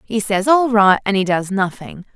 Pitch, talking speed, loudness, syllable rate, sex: 205 Hz, 220 wpm, -16 LUFS, 4.6 syllables/s, female